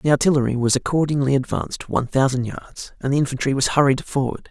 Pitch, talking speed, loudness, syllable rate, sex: 135 Hz, 185 wpm, -20 LUFS, 6.4 syllables/s, male